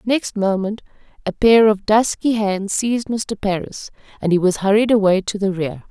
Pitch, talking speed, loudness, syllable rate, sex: 205 Hz, 185 wpm, -18 LUFS, 4.9 syllables/s, female